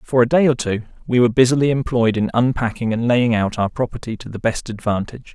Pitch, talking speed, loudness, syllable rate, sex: 120 Hz, 225 wpm, -18 LUFS, 6.2 syllables/s, male